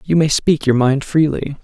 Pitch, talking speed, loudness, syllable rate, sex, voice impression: 145 Hz, 220 wpm, -15 LUFS, 4.6 syllables/s, male, masculine, adult-like, slightly dark, calm, slightly friendly, reassuring, slightly sweet, kind